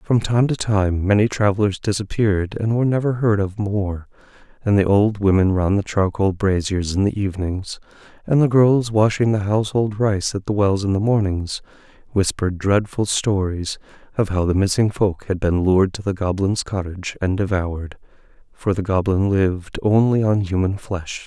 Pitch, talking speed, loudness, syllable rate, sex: 100 Hz, 175 wpm, -20 LUFS, 5.0 syllables/s, male